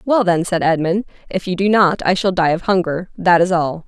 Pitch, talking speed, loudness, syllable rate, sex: 180 Hz, 230 wpm, -17 LUFS, 5.2 syllables/s, female